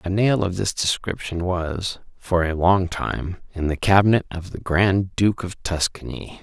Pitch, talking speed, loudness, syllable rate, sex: 90 Hz, 175 wpm, -22 LUFS, 4.2 syllables/s, male